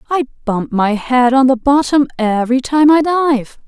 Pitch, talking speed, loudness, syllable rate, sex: 260 Hz, 180 wpm, -14 LUFS, 4.5 syllables/s, female